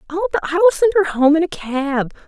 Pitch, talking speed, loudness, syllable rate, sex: 315 Hz, 265 wpm, -17 LUFS, 5.4 syllables/s, female